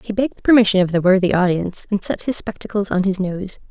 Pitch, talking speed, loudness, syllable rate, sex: 195 Hz, 225 wpm, -18 LUFS, 6.3 syllables/s, female